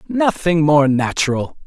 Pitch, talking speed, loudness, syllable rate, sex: 155 Hz, 110 wpm, -16 LUFS, 4.2 syllables/s, male